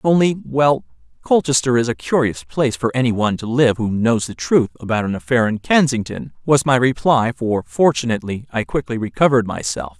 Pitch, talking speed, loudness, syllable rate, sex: 125 Hz, 170 wpm, -18 LUFS, 5.4 syllables/s, male